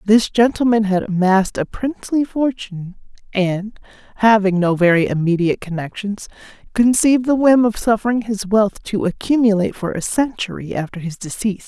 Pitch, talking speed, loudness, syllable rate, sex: 210 Hz, 145 wpm, -17 LUFS, 5.4 syllables/s, female